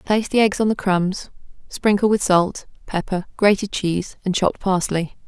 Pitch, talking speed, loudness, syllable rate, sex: 195 Hz, 170 wpm, -20 LUFS, 4.9 syllables/s, female